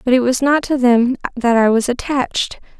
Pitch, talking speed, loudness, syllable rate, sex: 250 Hz, 215 wpm, -16 LUFS, 5.2 syllables/s, female